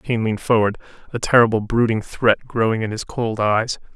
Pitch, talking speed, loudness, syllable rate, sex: 110 Hz, 180 wpm, -19 LUFS, 5.3 syllables/s, male